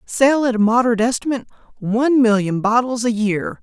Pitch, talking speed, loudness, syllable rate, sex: 235 Hz, 165 wpm, -17 LUFS, 6.0 syllables/s, female